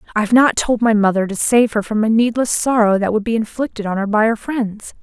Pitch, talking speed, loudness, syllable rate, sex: 220 Hz, 250 wpm, -16 LUFS, 5.8 syllables/s, female